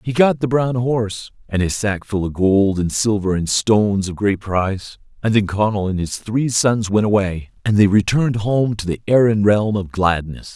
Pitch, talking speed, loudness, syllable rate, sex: 105 Hz, 210 wpm, -18 LUFS, 4.8 syllables/s, male